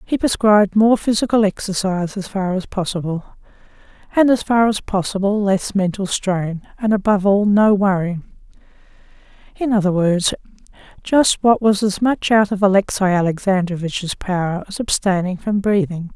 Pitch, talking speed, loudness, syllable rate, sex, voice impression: 195 Hz, 140 wpm, -17 LUFS, 5.1 syllables/s, female, feminine, middle-aged, slightly relaxed, soft, muffled, calm, reassuring, elegant, slightly modest